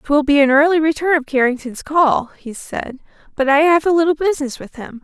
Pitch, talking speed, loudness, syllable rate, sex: 290 Hz, 215 wpm, -16 LUFS, 5.5 syllables/s, female